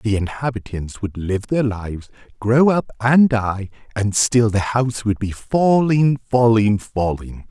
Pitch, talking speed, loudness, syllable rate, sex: 115 Hz, 150 wpm, -18 LUFS, 4.0 syllables/s, male